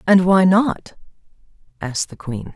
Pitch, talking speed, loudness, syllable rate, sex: 180 Hz, 140 wpm, -17 LUFS, 4.4 syllables/s, female